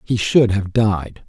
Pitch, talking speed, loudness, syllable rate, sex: 105 Hz, 190 wpm, -17 LUFS, 3.4 syllables/s, male